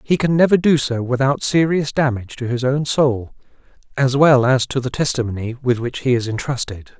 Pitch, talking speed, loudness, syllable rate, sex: 130 Hz, 195 wpm, -18 LUFS, 5.3 syllables/s, male